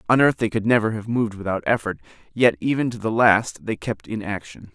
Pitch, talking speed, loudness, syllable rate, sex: 110 Hz, 225 wpm, -21 LUFS, 5.8 syllables/s, male